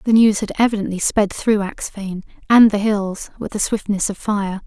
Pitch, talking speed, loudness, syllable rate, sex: 205 Hz, 195 wpm, -18 LUFS, 4.9 syllables/s, female